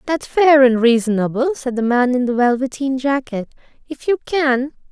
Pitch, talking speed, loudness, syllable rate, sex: 260 Hz, 170 wpm, -17 LUFS, 4.8 syllables/s, female